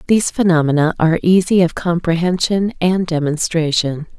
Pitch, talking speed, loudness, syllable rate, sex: 170 Hz, 115 wpm, -16 LUFS, 5.3 syllables/s, female